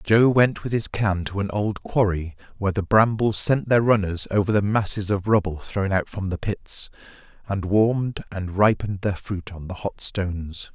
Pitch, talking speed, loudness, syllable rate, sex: 100 Hz, 195 wpm, -23 LUFS, 4.7 syllables/s, male